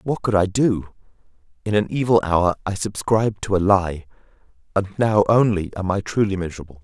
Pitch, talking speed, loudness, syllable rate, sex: 100 Hz, 175 wpm, -20 LUFS, 5.5 syllables/s, male